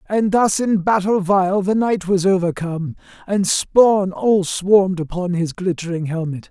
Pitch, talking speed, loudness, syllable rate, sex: 190 Hz, 155 wpm, -18 LUFS, 4.3 syllables/s, male